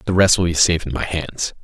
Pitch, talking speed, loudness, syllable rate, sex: 85 Hz, 295 wpm, -18 LUFS, 6.3 syllables/s, male